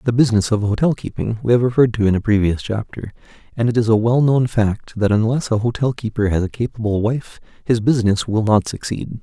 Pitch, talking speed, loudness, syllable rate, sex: 115 Hz, 215 wpm, -18 LUFS, 5.9 syllables/s, male